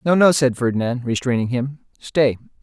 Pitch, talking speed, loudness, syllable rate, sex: 130 Hz, 160 wpm, -19 LUFS, 4.8 syllables/s, male